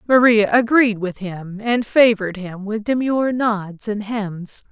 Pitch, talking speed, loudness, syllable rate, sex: 215 Hz, 155 wpm, -18 LUFS, 4.0 syllables/s, female